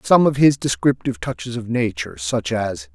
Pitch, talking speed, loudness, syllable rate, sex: 115 Hz, 185 wpm, -20 LUFS, 5.3 syllables/s, male